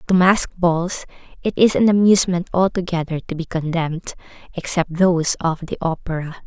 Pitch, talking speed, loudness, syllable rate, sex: 175 Hz, 160 wpm, -19 LUFS, 6.0 syllables/s, female